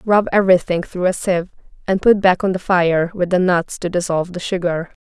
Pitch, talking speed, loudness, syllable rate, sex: 180 Hz, 215 wpm, -17 LUFS, 5.6 syllables/s, female